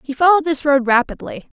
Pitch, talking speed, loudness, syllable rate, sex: 290 Hz, 190 wpm, -15 LUFS, 6.4 syllables/s, female